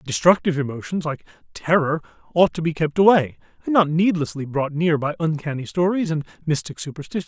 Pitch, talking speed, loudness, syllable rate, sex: 160 Hz, 165 wpm, -21 LUFS, 5.9 syllables/s, male